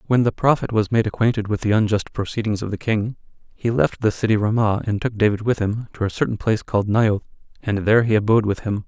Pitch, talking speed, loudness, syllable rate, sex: 110 Hz, 235 wpm, -20 LUFS, 6.3 syllables/s, male